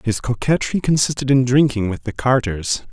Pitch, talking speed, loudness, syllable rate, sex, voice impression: 125 Hz, 165 wpm, -18 LUFS, 5.1 syllables/s, male, masculine, adult-like, cool, sincere, slightly friendly